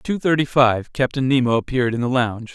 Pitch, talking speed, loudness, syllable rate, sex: 130 Hz, 235 wpm, -19 LUFS, 6.4 syllables/s, male